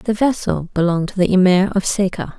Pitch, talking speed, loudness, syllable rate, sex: 190 Hz, 200 wpm, -17 LUFS, 5.6 syllables/s, female